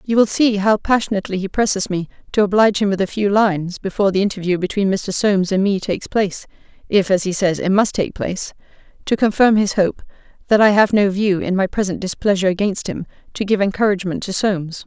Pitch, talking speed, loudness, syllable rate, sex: 195 Hz, 215 wpm, -18 LUFS, 5.8 syllables/s, female